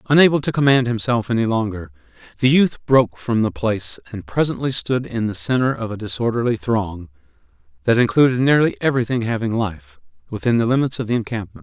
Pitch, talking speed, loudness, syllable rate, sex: 115 Hz, 175 wpm, -19 LUFS, 6.0 syllables/s, male